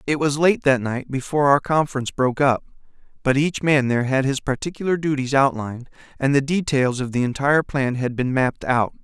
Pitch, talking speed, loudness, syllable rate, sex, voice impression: 135 Hz, 200 wpm, -20 LUFS, 5.9 syllables/s, male, masculine, adult-like, fluent, refreshing, sincere